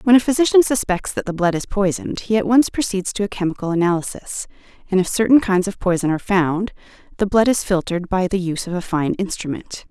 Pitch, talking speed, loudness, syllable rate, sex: 195 Hz, 220 wpm, -19 LUFS, 6.2 syllables/s, female